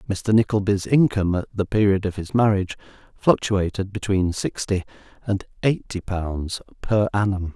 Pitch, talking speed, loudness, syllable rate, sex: 100 Hz, 135 wpm, -22 LUFS, 4.9 syllables/s, male